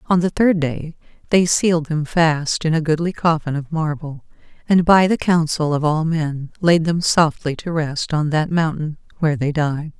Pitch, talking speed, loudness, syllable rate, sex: 160 Hz, 190 wpm, -18 LUFS, 4.6 syllables/s, female